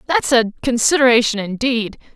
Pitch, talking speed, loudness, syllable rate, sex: 240 Hz, 110 wpm, -16 LUFS, 5.2 syllables/s, female